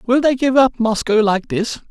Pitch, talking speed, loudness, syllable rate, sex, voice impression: 235 Hz, 220 wpm, -16 LUFS, 4.7 syllables/s, male, very masculine, slightly old, thick, tensed, powerful, bright, soft, clear, slightly halting, slightly raspy, slightly cool, intellectual, refreshing, very sincere, very calm, mature, friendly, slightly reassuring, slightly unique, slightly elegant, wild, slightly sweet, lively, kind, slightly modest